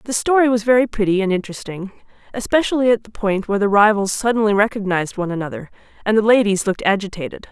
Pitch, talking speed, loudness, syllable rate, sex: 210 Hz, 185 wpm, -18 LUFS, 7.1 syllables/s, female